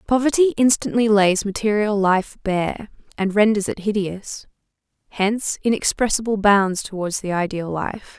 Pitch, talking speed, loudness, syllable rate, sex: 205 Hz, 125 wpm, -20 LUFS, 4.6 syllables/s, female